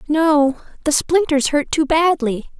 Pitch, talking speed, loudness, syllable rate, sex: 295 Hz, 140 wpm, -17 LUFS, 3.8 syllables/s, female